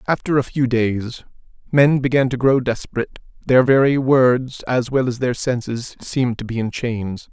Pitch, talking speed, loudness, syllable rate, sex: 125 Hz, 180 wpm, -18 LUFS, 4.7 syllables/s, male